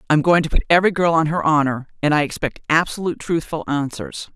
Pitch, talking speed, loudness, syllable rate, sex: 160 Hz, 220 wpm, -19 LUFS, 6.8 syllables/s, female